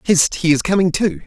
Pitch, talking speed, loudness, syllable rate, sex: 165 Hz, 235 wpm, -16 LUFS, 5.2 syllables/s, male